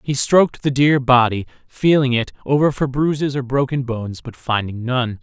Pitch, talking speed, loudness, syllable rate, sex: 130 Hz, 185 wpm, -18 LUFS, 5.0 syllables/s, male